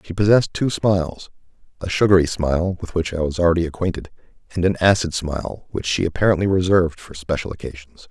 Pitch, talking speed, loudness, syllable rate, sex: 85 Hz, 170 wpm, -20 LUFS, 5.3 syllables/s, male